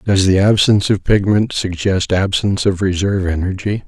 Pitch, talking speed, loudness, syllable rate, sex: 95 Hz, 155 wpm, -15 LUFS, 5.3 syllables/s, male